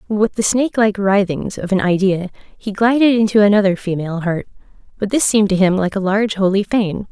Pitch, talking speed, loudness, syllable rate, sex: 200 Hz, 200 wpm, -16 LUFS, 5.7 syllables/s, female